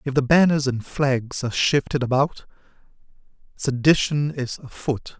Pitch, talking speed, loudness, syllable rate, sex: 135 Hz, 125 wpm, -21 LUFS, 4.6 syllables/s, male